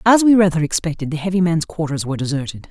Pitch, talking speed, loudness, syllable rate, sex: 165 Hz, 220 wpm, -18 LUFS, 6.9 syllables/s, female